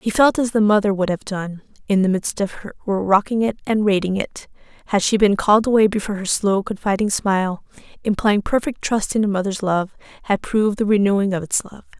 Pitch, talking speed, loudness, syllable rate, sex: 205 Hz, 205 wpm, -19 LUFS, 5.6 syllables/s, female